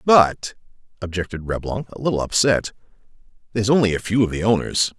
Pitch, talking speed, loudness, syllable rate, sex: 105 Hz, 155 wpm, -20 LUFS, 6.0 syllables/s, male